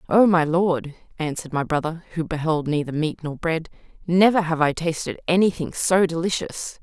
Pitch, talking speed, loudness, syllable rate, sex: 165 Hz, 165 wpm, -22 LUFS, 5.3 syllables/s, female